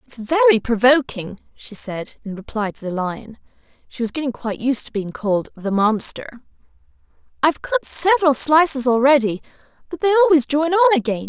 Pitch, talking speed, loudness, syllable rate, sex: 260 Hz, 165 wpm, -18 LUFS, 4.3 syllables/s, female